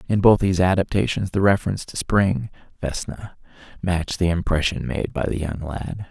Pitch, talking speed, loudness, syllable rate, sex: 95 Hz, 165 wpm, -22 LUFS, 5.6 syllables/s, male